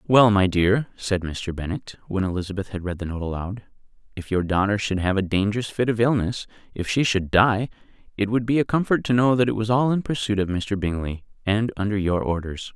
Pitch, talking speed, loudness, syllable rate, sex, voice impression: 105 Hz, 215 wpm, -23 LUFS, 5.6 syllables/s, male, masculine, adult-like, slightly thick, cool, slightly calm, slightly elegant, slightly kind